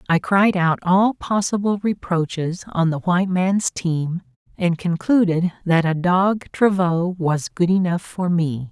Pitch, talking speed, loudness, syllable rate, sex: 180 Hz, 150 wpm, -20 LUFS, 4.0 syllables/s, female